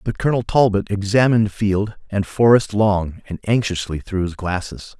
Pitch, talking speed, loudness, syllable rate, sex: 100 Hz, 155 wpm, -19 LUFS, 5.0 syllables/s, male